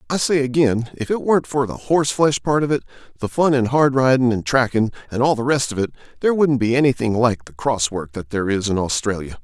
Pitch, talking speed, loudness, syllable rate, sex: 125 Hz, 250 wpm, -19 LUFS, 6.1 syllables/s, male